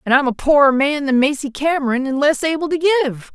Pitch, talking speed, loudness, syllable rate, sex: 285 Hz, 235 wpm, -17 LUFS, 6.0 syllables/s, female